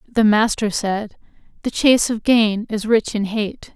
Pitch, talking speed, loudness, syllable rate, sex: 215 Hz, 175 wpm, -18 LUFS, 4.3 syllables/s, female